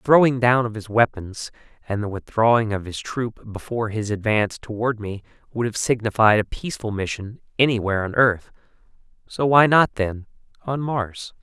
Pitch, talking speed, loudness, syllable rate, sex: 110 Hz, 170 wpm, -21 LUFS, 5.2 syllables/s, male